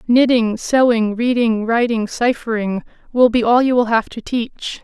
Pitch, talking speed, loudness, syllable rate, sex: 235 Hz, 160 wpm, -17 LUFS, 4.3 syllables/s, female